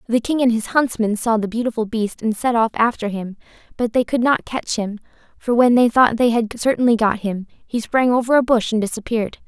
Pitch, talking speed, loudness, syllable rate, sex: 230 Hz, 230 wpm, -19 LUFS, 5.5 syllables/s, female